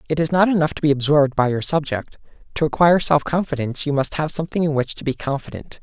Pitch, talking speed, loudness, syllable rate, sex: 150 Hz, 225 wpm, -19 LUFS, 6.8 syllables/s, male